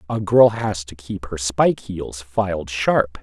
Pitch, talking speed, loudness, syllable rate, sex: 95 Hz, 185 wpm, -20 LUFS, 4.0 syllables/s, male